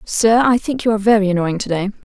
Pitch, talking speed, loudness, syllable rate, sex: 210 Hz, 255 wpm, -16 LUFS, 6.7 syllables/s, female